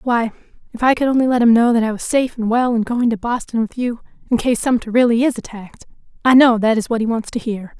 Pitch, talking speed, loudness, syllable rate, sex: 235 Hz, 270 wpm, -17 LUFS, 6.4 syllables/s, female